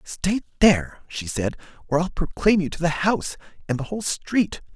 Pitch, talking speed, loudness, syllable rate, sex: 170 Hz, 190 wpm, -23 LUFS, 5.2 syllables/s, male